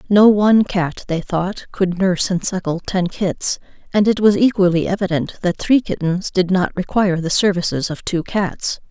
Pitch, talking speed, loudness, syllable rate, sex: 185 Hz, 180 wpm, -18 LUFS, 4.7 syllables/s, female